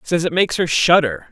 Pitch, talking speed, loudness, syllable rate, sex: 165 Hz, 230 wpm, -16 LUFS, 5.8 syllables/s, male